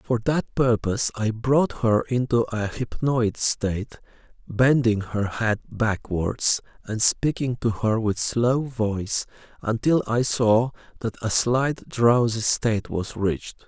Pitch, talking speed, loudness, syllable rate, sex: 115 Hz, 135 wpm, -23 LUFS, 3.8 syllables/s, male